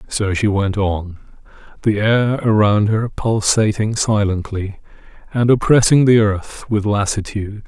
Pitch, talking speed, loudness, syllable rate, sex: 105 Hz, 125 wpm, -17 LUFS, 4.1 syllables/s, male